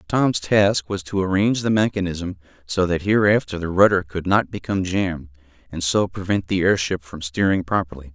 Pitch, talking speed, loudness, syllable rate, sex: 90 Hz, 175 wpm, -20 LUFS, 5.4 syllables/s, male